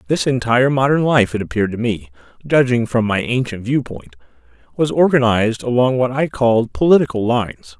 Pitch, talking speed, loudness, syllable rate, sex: 120 Hz, 160 wpm, -16 LUFS, 5.9 syllables/s, male